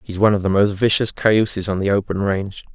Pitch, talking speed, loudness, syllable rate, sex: 100 Hz, 240 wpm, -18 LUFS, 6.2 syllables/s, male